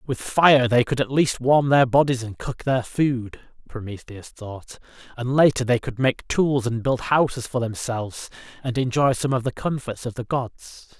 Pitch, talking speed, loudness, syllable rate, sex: 125 Hz, 190 wpm, -22 LUFS, 4.5 syllables/s, male